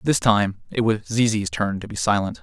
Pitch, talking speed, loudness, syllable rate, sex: 110 Hz, 225 wpm, -22 LUFS, 4.9 syllables/s, male